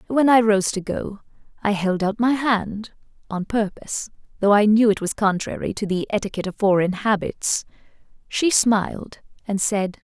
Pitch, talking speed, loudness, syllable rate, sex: 210 Hz, 165 wpm, -21 LUFS, 4.9 syllables/s, female